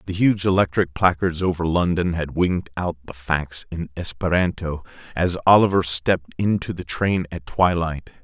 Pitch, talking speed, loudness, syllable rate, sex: 85 Hz, 155 wpm, -21 LUFS, 4.9 syllables/s, male